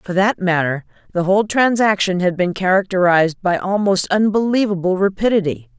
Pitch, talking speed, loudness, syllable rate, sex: 190 Hz, 135 wpm, -17 LUFS, 5.4 syllables/s, female